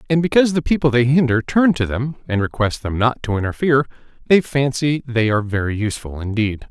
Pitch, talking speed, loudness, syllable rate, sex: 125 Hz, 195 wpm, -18 LUFS, 6.1 syllables/s, male